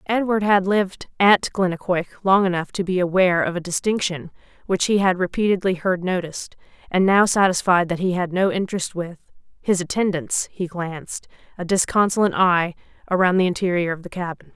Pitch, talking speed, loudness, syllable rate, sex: 185 Hz, 170 wpm, -20 LUFS, 5.7 syllables/s, female